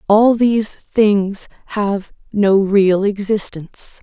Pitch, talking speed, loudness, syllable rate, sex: 205 Hz, 105 wpm, -16 LUFS, 3.2 syllables/s, female